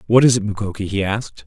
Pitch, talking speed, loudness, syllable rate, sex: 105 Hz, 245 wpm, -19 LUFS, 6.9 syllables/s, male